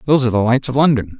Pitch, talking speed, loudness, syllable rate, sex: 125 Hz, 300 wpm, -15 LUFS, 7.8 syllables/s, male